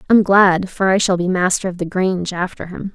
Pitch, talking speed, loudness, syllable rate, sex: 185 Hz, 245 wpm, -16 LUFS, 5.5 syllables/s, female